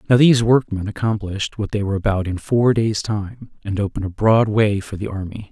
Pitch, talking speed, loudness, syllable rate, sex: 105 Hz, 220 wpm, -19 LUFS, 6.0 syllables/s, male